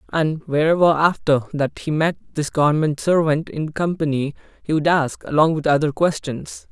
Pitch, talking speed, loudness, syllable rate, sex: 155 Hz, 160 wpm, -20 LUFS, 5.0 syllables/s, male